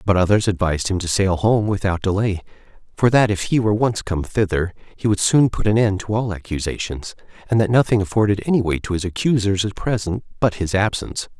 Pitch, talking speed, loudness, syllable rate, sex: 100 Hz, 210 wpm, -19 LUFS, 5.9 syllables/s, male